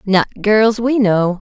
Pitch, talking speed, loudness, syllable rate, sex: 205 Hz, 165 wpm, -14 LUFS, 3.4 syllables/s, female